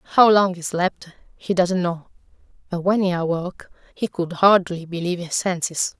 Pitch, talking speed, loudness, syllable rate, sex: 180 Hz, 170 wpm, -21 LUFS, 5.0 syllables/s, female